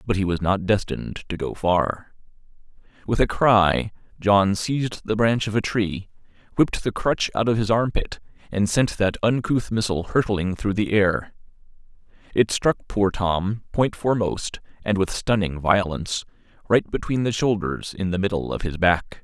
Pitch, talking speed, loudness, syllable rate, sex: 100 Hz, 170 wpm, -22 LUFS, 4.7 syllables/s, male